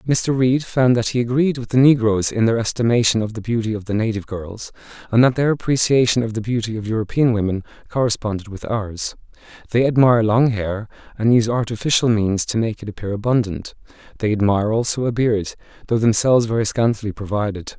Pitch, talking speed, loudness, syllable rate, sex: 115 Hz, 185 wpm, -19 LUFS, 6.0 syllables/s, male